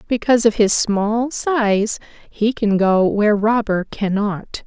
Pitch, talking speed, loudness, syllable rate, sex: 215 Hz, 140 wpm, -17 LUFS, 3.8 syllables/s, female